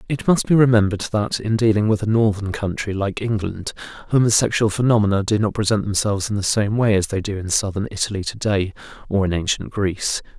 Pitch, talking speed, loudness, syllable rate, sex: 105 Hz, 195 wpm, -20 LUFS, 6.1 syllables/s, male